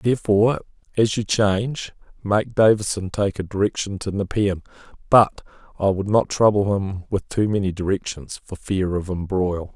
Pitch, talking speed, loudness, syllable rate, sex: 100 Hz, 155 wpm, -21 LUFS, 4.8 syllables/s, male